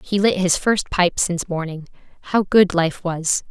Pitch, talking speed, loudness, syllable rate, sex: 180 Hz, 190 wpm, -19 LUFS, 4.4 syllables/s, female